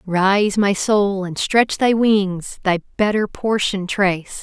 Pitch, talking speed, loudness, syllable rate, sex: 200 Hz, 150 wpm, -18 LUFS, 3.4 syllables/s, female